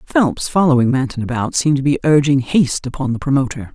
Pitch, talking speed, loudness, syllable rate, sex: 140 Hz, 190 wpm, -16 LUFS, 6.2 syllables/s, female